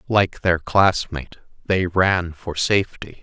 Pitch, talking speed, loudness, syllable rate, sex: 90 Hz, 130 wpm, -20 LUFS, 4.0 syllables/s, male